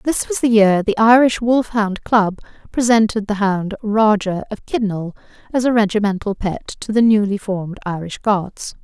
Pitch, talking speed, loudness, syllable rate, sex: 210 Hz, 165 wpm, -17 LUFS, 4.6 syllables/s, female